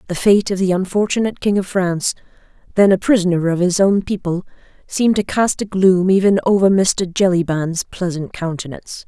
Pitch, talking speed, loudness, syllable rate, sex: 185 Hz, 170 wpm, -17 LUFS, 5.5 syllables/s, female